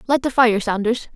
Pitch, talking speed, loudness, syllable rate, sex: 235 Hz, 205 wpm, -18 LUFS, 5.2 syllables/s, female